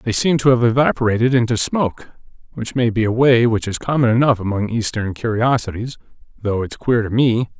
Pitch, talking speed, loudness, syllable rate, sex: 115 Hz, 180 wpm, -17 LUFS, 5.7 syllables/s, male